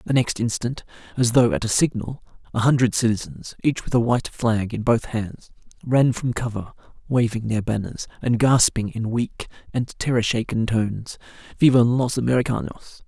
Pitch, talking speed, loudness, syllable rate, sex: 120 Hz, 165 wpm, -22 LUFS, 5.2 syllables/s, male